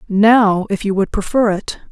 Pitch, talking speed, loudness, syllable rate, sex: 205 Hz, 190 wpm, -15 LUFS, 4.3 syllables/s, female